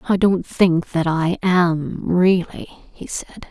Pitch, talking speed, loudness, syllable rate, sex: 180 Hz, 155 wpm, -19 LUFS, 3.1 syllables/s, female